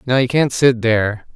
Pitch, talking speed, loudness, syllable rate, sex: 120 Hz, 220 wpm, -16 LUFS, 5.0 syllables/s, male